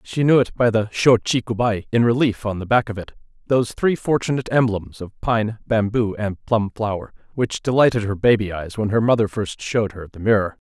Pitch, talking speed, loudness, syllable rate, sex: 110 Hz, 205 wpm, -20 LUFS, 5.6 syllables/s, male